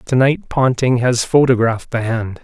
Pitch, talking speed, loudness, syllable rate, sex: 125 Hz, 175 wpm, -16 LUFS, 4.7 syllables/s, male